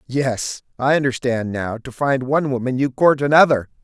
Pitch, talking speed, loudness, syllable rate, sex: 130 Hz, 170 wpm, -19 LUFS, 5.0 syllables/s, male